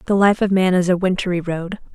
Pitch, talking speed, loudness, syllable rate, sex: 185 Hz, 245 wpm, -18 LUFS, 5.4 syllables/s, female